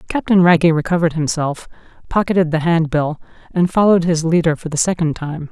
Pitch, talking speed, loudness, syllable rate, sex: 165 Hz, 165 wpm, -16 LUFS, 6.1 syllables/s, female